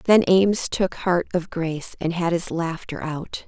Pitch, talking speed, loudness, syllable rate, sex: 170 Hz, 190 wpm, -23 LUFS, 4.5 syllables/s, female